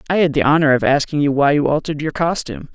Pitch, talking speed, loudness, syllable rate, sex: 150 Hz, 260 wpm, -16 LUFS, 7.1 syllables/s, male